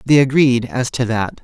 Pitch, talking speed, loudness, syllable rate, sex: 125 Hz, 210 wpm, -16 LUFS, 4.6 syllables/s, male